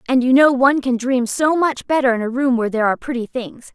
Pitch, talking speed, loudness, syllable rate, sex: 255 Hz, 275 wpm, -17 LUFS, 6.4 syllables/s, female